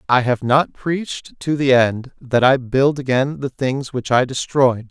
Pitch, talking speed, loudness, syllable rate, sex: 130 Hz, 195 wpm, -18 LUFS, 4.1 syllables/s, male